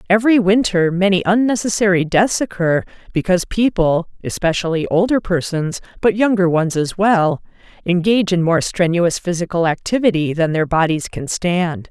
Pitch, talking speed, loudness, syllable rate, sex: 180 Hz, 125 wpm, -17 LUFS, 5.1 syllables/s, female